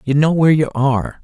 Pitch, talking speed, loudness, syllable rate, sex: 140 Hz, 245 wpm, -15 LUFS, 6.9 syllables/s, male